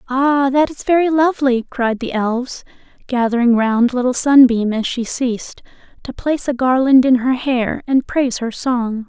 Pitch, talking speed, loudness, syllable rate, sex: 255 Hz, 170 wpm, -16 LUFS, 4.7 syllables/s, female